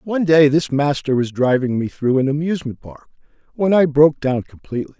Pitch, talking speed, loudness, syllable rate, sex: 145 Hz, 190 wpm, -17 LUFS, 5.9 syllables/s, male